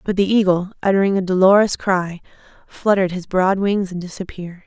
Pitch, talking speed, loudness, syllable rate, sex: 190 Hz, 165 wpm, -18 LUFS, 5.8 syllables/s, female